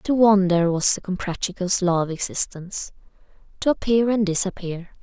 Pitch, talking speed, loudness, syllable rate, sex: 190 Hz, 130 wpm, -21 LUFS, 5.2 syllables/s, female